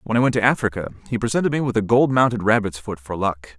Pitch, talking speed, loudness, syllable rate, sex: 110 Hz, 270 wpm, -20 LUFS, 6.7 syllables/s, male